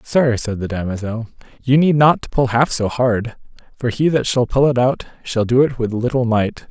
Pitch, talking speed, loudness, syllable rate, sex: 125 Hz, 225 wpm, -17 LUFS, 4.8 syllables/s, male